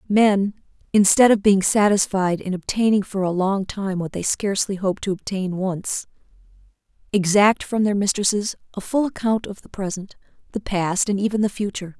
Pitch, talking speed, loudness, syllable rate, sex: 200 Hz, 170 wpm, -21 LUFS, 5.2 syllables/s, female